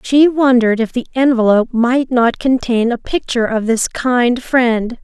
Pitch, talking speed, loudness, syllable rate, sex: 240 Hz, 165 wpm, -14 LUFS, 4.6 syllables/s, female